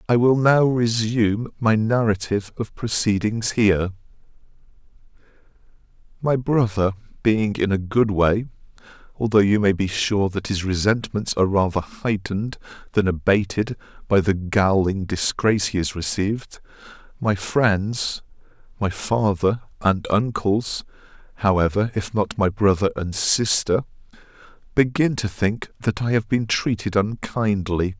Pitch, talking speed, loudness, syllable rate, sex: 105 Hz, 120 wpm, -21 LUFS, 3.7 syllables/s, male